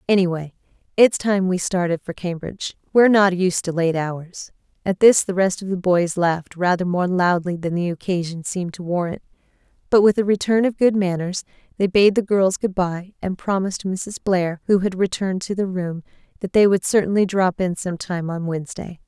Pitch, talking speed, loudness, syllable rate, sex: 185 Hz, 200 wpm, -20 LUFS, 5.3 syllables/s, female